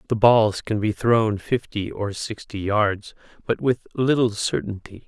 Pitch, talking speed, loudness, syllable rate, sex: 110 Hz, 155 wpm, -22 LUFS, 4.0 syllables/s, male